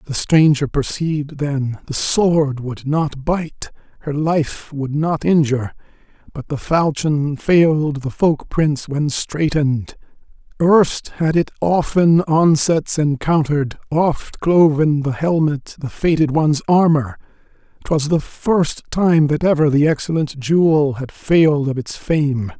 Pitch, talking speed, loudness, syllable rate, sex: 150 Hz, 135 wpm, -17 LUFS, 3.9 syllables/s, male